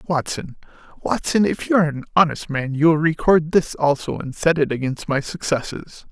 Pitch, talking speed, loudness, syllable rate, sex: 155 Hz, 185 wpm, -20 LUFS, 5.3 syllables/s, male